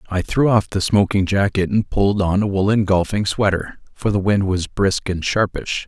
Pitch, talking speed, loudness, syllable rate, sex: 100 Hz, 205 wpm, -19 LUFS, 4.9 syllables/s, male